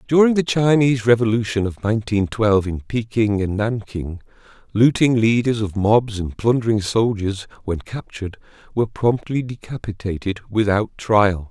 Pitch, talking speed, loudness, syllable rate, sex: 110 Hz, 130 wpm, -19 LUFS, 4.9 syllables/s, male